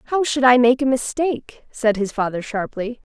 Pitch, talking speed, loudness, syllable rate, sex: 245 Hz, 190 wpm, -19 LUFS, 5.1 syllables/s, female